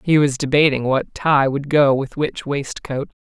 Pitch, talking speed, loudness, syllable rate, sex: 140 Hz, 185 wpm, -18 LUFS, 4.3 syllables/s, male